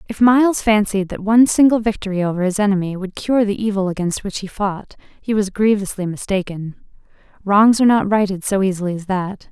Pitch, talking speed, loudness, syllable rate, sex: 200 Hz, 190 wpm, -17 LUFS, 5.7 syllables/s, female